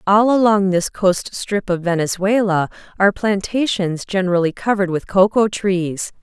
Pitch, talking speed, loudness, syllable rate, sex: 195 Hz, 135 wpm, -18 LUFS, 4.7 syllables/s, female